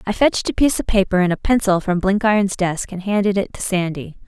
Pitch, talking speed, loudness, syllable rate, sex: 195 Hz, 240 wpm, -18 LUFS, 6.1 syllables/s, female